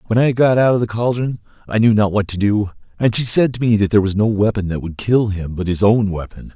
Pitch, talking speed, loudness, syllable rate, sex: 105 Hz, 285 wpm, -17 LUFS, 6.0 syllables/s, male